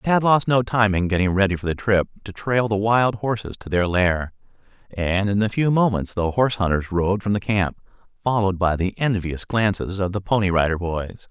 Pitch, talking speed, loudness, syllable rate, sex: 100 Hz, 210 wpm, -21 LUFS, 5.2 syllables/s, male